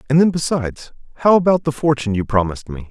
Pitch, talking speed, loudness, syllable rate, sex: 130 Hz, 205 wpm, -17 LUFS, 7.0 syllables/s, male